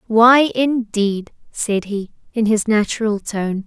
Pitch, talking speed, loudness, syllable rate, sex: 220 Hz, 130 wpm, -18 LUFS, 3.6 syllables/s, female